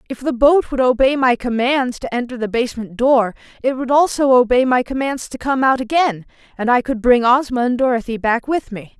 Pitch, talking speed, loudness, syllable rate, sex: 250 Hz, 215 wpm, -17 LUFS, 5.4 syllables/s, female